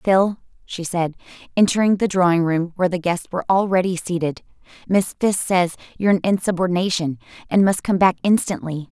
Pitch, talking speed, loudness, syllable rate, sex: 180 Hz, 160 wpm, -20 LUFS, 5.8 syllables/s, female